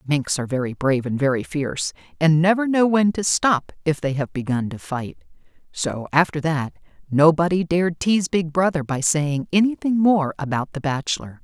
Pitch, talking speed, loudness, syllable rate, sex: 155 Hz, 180 wpm, -21 LUFS, 5.2 syllables/s, female